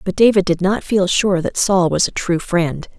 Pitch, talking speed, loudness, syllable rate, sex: 185 Hz, 240 wpm, -16 LUFS, 4.6 syllables/s, female